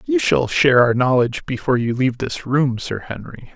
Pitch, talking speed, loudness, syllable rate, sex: 130 Hz, 205 wpm, -18 LUFS, 5.5 syllables/s, male